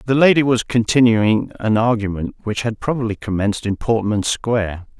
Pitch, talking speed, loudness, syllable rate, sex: 110 Hz, 155 wpm, -18 LUFS, 5.2 syllables/s, male